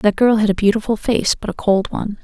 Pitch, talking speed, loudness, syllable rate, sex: 215 Hz, 270 wpm, -17 LUFS, 6.0 syllables/s, female